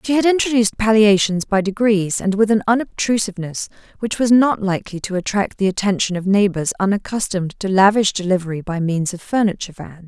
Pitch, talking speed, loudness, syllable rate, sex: 200 Hz, 175 wpm, -18 LUFS, 6.0 syllables/s, female